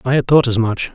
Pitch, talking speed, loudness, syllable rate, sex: 125 Hz, 320 wpm, -15 LUFS, 5.9 syllables/s, male